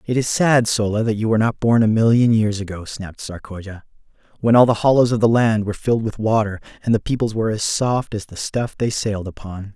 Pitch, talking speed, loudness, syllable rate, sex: 110 Hz, 235 wpm, -18 LUFS, 6.0 syllables/s, male